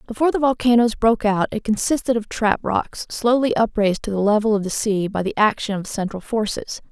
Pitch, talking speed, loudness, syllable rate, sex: 220 Hz, 210 wpm, -20 LUFS, 5.8 syllables/s, female